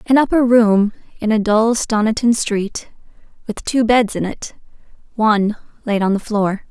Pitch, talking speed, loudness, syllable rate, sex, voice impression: 220 Hz, 150 wpm, -16 LUFS, 4.5 syllables/s, female, feminine, adult-like, tensed, powerful, bright, clear, fluent, intellectual, friendly, elegant, lively, slightly sharp